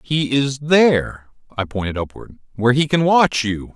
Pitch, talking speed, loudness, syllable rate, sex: 130 Hz, 160 wpm, -18 LUFS, 4.7 syllables/s, male